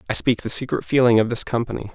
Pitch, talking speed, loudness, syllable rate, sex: 115 Hz, 245 wpm, -19 LUFS, 6.9 syllables/s, male